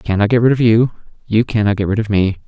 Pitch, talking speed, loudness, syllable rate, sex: 105 Hz, 290 wpm, -15 LUFS, 6.8 syllables/s, male